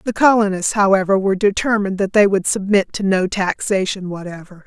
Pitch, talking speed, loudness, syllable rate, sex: 195 Hz, 165 wpm, -17 LUFS, 5.7 syllables/s, female